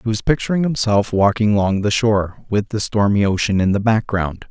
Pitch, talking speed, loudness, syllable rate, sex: 105 Hz, 200 wpm, -18 LUFS, 5.4 syllables/s, male